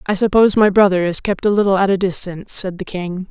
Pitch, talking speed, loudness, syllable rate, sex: 195 Hz, 255 wpm, -16 LUFS, 6.3 syllables/s, female